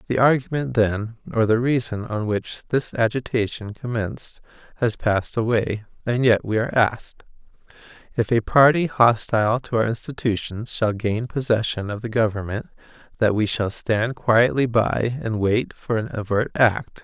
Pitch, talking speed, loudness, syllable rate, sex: 115 Hz, 155 wpm, -22 LUFS, 4.6 syllables/s, male